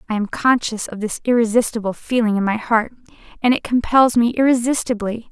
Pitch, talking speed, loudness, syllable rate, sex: 230 Hz, 170 wpm, -18 LUFS, 5.7 syllables/s, female